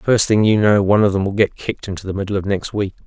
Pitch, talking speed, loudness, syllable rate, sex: 100 Hz, 315 wpm, -17 LUFS, 6.8 syllables/s, male